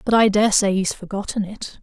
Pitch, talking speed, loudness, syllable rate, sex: 205 Hz, 230 wpm, -20 LUFS, 5.2 syllables/s, female